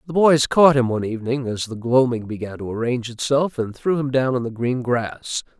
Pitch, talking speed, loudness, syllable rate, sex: 125 Hz, 225 wpm, -20 LUFS, 5.5 syllables/s, male